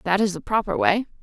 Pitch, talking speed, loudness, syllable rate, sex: 210 Hz, 245 wpm, -22 LUFS, 6.1 syllables/s, female